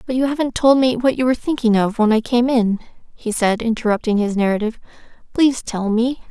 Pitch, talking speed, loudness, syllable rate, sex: 235 Hz, 210 wpm, -18 LUFS, 6.1 syllables/s, female